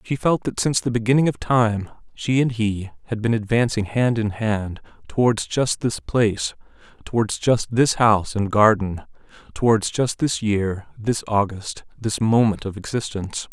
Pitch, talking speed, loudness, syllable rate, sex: 110 Hz, 165 wpm, -21 LUFS, 4.6 syllables/s, male